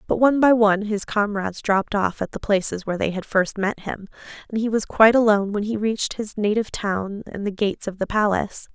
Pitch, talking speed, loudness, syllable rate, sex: 210 Hz, 235 wpm, -21 LUFS, 6.2 syllables/s, female